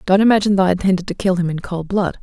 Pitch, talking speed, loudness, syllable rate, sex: 185 Hz, 295 wpm, -17 LUFS, 7.7 syllables/s, female